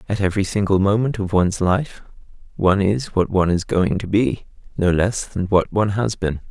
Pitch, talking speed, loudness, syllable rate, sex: 100 Hz, 205 wpm, -19 LUFS, 5.5 syllables/s, male